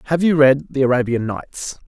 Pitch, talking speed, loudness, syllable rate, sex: 135 Hz, 190 wpm, -17 LUFS, 5.2 syllables/s, male